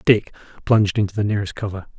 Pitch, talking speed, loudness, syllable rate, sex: 105 Hz, 180 wpm, -20 LUFS, 7.5 syllables/s, male